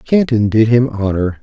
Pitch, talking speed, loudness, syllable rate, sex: 115 Hz, 170 wpm, -14 LUFS, 4.5 syllables/s, male